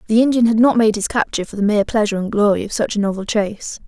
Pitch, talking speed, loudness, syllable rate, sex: 215 Hz, 280 wpm, -17 LUFS, 7.4 syllables/s, female